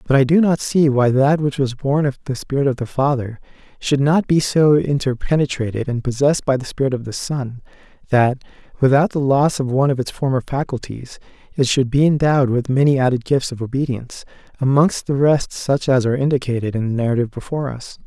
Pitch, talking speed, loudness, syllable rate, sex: 135 Hz, 205 wpm, -18 LUFS, 5.9 syllables/s, male